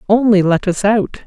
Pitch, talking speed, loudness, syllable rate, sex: 200 Hz, 190 wpm, -14 LUFS, 4.8 syllables/s, female